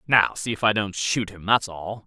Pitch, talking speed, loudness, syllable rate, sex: 100 Hz, 260 wpm, -23 LUFS, 4.8 syllables/s, male